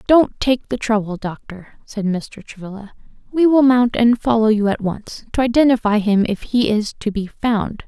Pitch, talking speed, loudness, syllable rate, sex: 225 Hz, 190 wpm, -17 LUFS, 4.6 syllables/s, female